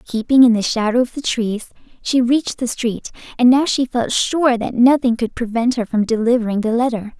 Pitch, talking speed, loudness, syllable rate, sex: 240 Hz, 210 wpm, -17 LUFS, 5.3 syllables/s, female